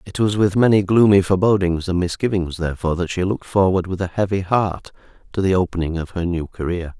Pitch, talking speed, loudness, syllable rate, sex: 95 Hz, 205 wpm, -19 LUFS, 6.2 syllables/s, male